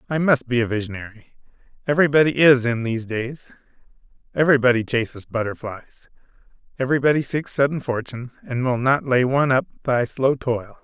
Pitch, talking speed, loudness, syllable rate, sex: 125 Hz, 145 wpm, -20 LUFS, 5.9 syllables/s, male